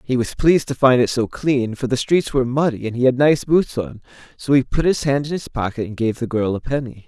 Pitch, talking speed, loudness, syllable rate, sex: 130 Hz, 280 wpm, -19 LUFS, 5.7 syllables/s, male